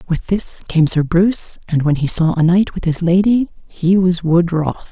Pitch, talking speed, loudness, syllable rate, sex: 175 Hz, 220 wpm, -16 LUFS, 4.6 syllables/s, female